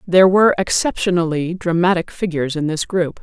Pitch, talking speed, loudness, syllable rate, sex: 175 Hz, 150 wpm, -17 LUFS, 5.9 syllables/s, female